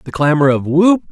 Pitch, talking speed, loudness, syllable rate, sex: 160 Hz, 215 wpm, -13 LUFS, 4.9 syllables/s, male